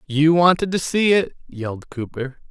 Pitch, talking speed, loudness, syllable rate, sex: 155 Hz, 165 wpm, -19 LUFS, 4.7 syllables/s, male